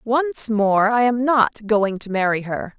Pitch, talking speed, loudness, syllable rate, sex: 220 Hz, 195 wpm, -19 LUFS, 4.0 syllables/s, female